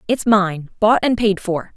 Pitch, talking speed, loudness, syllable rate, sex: 205 Hz, 170 wpm, -17 LUFS, 4.1 syllables/s, female